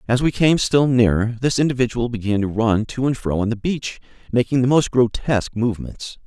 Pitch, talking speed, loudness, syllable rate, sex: 120 Hz, 200 wpm, -19 LUFS, 5.5 syllables/s, male